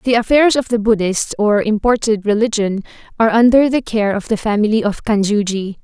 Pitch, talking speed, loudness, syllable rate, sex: 220 Hz, 175 wpm, -15 LUFS, 5.6 syllables/s, female